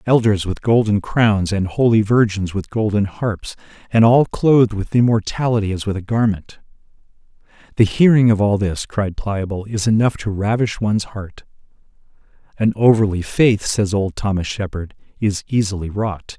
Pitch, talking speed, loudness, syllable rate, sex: 105 Hz, 155 wpm, -18 LUFS, 4.8 syllables/s, male